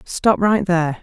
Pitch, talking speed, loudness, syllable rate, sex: 185 Hz, 175 wpm, -17 LUFS, 4.3 syllables/s, female